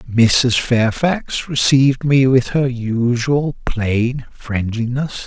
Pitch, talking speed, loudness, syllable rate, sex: 125 Hz, 105 wpm, -16 LUFS, 3.0 syllables/s, male